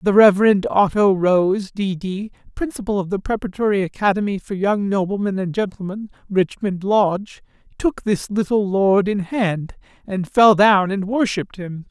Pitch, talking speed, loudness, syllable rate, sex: 200 Hz, 150 wpm, -19 LUFS, 4.8 syllables/s, male